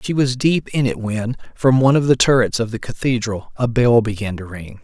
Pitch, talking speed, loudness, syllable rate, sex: 120 Hz, 235 wpm, -18 LUFS, 5.3 syllables/s, male